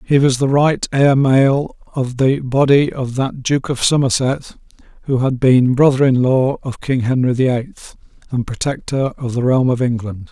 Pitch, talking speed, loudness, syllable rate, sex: 130 Hz, 185 wpm, -16 LUFS, 4.4 syllables/s, male